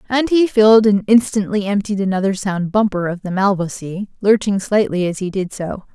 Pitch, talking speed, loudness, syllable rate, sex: 200 Hz, 180 wpm, -17 LUFS, 5.2 syllables/s, female